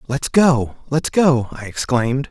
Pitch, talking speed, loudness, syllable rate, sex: 135 Hz, 155 wpm, -18 LUFS, 4.0 syllables/s, male